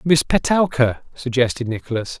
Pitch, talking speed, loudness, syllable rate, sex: 130 Hz, 110 wpm, -19 LUFS, 5.1 syllables/s, male